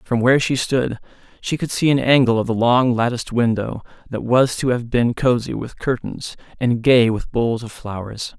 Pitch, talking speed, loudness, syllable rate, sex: 120 Hz, 200 wpm, -19 LUFS, 4.9 syllables/s, male